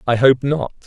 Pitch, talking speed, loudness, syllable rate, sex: 130 Hz, 210 wpm, -17 LUFS, 4.9 syllables/s, male